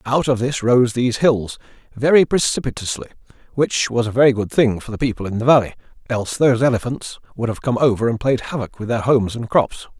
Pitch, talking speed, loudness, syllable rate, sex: 120 Hz, 210 wpm, -18 LUFS, 6.1 syllables/s, male